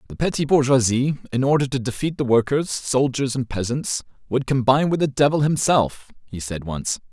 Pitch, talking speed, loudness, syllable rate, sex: 130 Hz, 175 wpm, -21 LUFS, 5.3 syllables/s, male